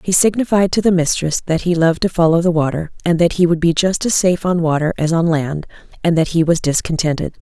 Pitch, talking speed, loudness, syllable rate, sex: 170 Hz, 240 wpm, -16 LUFS, 6.1 syllables/s, female